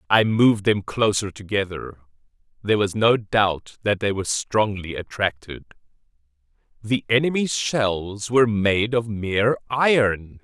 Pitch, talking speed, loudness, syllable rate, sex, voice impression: 105 Hz, 125 wpm, -21 LUFS, 4.3 syllables/s, male, very masculine, very middle-aged, very thick, tensed, very powerful, dark, very hard, slightly clear, slightly fluent, cool, very intellectual, sincere, very calm, slightly friendly, slightly reassuring, very unique, elegant, wild, slightly sweet, slightly lively, very strict, slightly intense